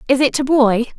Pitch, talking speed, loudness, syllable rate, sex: 260 Hz, 245 wpm, -15 LUFS, 5.3 syllables/s, female